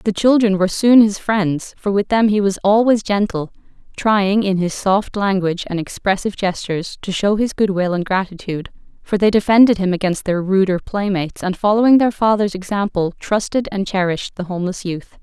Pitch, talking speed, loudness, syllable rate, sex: 195 Hz, 185 wpm, -17 LUFS, 5.5 syllables/s, female